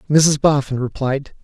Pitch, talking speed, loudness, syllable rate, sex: 140 Hz, 125 wpm, -17 LUFS, 4.3 syllables/s, male